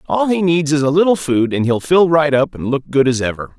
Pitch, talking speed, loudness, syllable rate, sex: 150 Hz, 285 wpm, -15 LUFS, 5.6 syllables/s, male